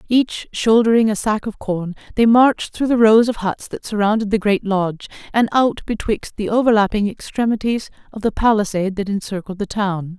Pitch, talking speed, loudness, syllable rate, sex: 210 Hz, 185 wpm, -18 LUFS, 5.3 syllables/s, female